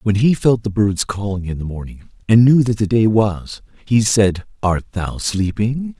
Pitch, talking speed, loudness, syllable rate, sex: 105 Hz, 190 wpm, -17 LUFS, 4.5 syllables/s, male